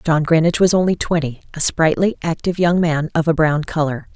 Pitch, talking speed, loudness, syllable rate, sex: 160 Hz, 200 wpm, -17 LUFS, 5.7 syllables/s, female